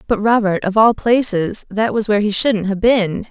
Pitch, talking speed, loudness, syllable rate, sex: 210 Hz, 220 wpm, -16 LUFS, 4.8 syllables/s, female